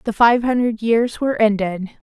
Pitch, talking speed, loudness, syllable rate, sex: 225 Hz, 175 wpm, -17 LUFS, 4.8 syllables/s, female